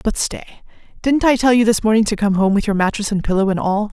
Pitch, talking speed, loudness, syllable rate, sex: 215 Hz, 270 wpm, -17 LUFS, 6.4 syllables/s, female